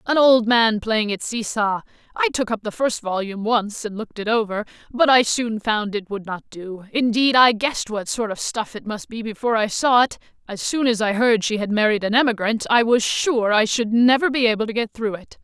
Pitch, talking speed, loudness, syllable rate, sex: 225 Hz, 240 wpm, -20 LUFS, 5.3 syllables/s, female